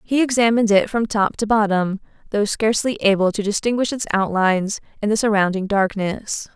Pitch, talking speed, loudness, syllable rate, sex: 210 Hz, 165 wpm, -19 LUFS, 5.5 syllables/s, female